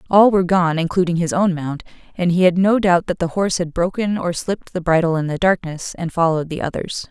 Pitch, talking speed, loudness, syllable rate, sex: 175 Hz, 235 wpm, -18 LUFS, 6.0 syllables/s, female